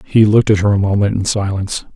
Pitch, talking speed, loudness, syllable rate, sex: 100 Hz, 245 wpm, -15 LUFS, 6.7 syllables/s, male